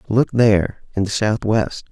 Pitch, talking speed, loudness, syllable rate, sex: 105 Hz, 155 wpm, -18 LUFS, 4.5 syllables/s, male